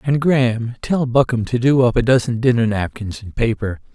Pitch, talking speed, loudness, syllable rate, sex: 120 Hz, 200 wpm, -18 LUFS, 5.2 syllables/s, male